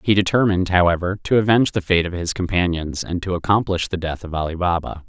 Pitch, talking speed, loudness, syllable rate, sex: 90 Hz, 215 wpm, -20 LUFS, 6.3 syllables/s, male